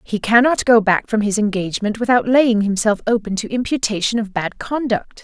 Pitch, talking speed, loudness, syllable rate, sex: 220 Hz, 185 wpm, -17 LUFS, 5.3 syllables/s, female